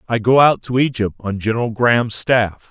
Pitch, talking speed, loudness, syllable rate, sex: 115 Hz, 200 wpm, -16 LUFS, 5.2 syllables/s, male